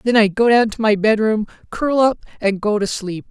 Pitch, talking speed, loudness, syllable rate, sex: 215 Hz, 235 wpm, -17 LUFS, 5.2 syllables/s, female